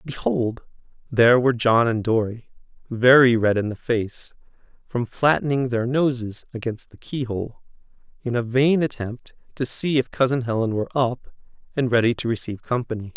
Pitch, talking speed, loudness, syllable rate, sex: 120 Hz, 160 wpm, -22 LUFS, 5.1 syllables/s, male